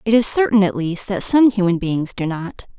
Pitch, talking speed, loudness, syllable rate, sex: 200 Hz, 235 wpm, -17 LUFS, 5.1 syllables/s, female